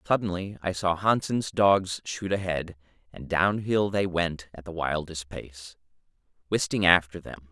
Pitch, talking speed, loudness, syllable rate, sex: 90 Hz, 145 wpm, -26 LUFS, 4.2 syllables/s, male